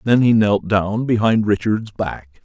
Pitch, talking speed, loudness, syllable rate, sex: 105 Hz, 170 wpm, -18 LUFS, 4.1 syllables/s, male